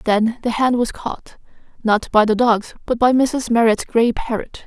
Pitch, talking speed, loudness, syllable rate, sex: 230 Hz, 195 wpm, -18 LUFS, 4.2 syllables/s, female